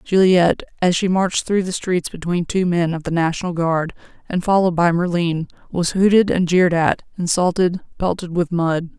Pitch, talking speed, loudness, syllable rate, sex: 175 Hz, 180 wpm, -18 LUFS, 5.2 syllables/s, female